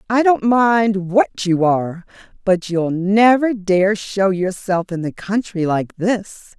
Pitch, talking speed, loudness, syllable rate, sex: 195 Hz, 155 wpm, -17 LUFS, 3.6 syllables/s, female